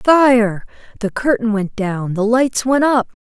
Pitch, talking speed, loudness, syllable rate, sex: 230 Hz, 150 wpm, -16 LUFS, 3.8 syllables/s, female